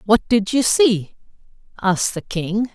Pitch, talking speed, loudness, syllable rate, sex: 210 Hz, 155 wpm, -18 LUFS, 4.0 syllables/s, female